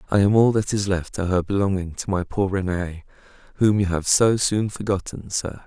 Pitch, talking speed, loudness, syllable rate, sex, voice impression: 95 Hz, 210 wpm, -22 LUFS, 5.1 syllables/s, male, masculine, adult-like, slightly thick, slightly dark, cool, sincere, slightly calm, slightly kind